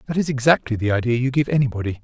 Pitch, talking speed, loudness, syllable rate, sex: 125 Hz, 235 wpm, -20 LUFS, 7.6 syllables/s, male